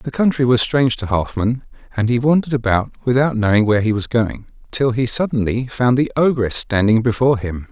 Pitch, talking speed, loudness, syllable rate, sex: 120 Hz, 195 wpm, -17 LUFS, 5.7 syllables/s, male